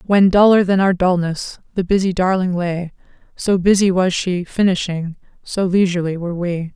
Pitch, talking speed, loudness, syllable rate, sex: 185 Hz, 160 wpm, -17 LUFS, 5.0 syllables/s, female